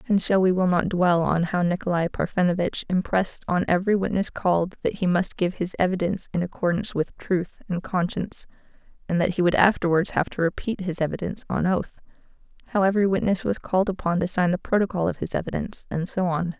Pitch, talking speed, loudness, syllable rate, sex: 180 Hz, 200 wpm, -24 LUFS, 6.1 syllables/s, female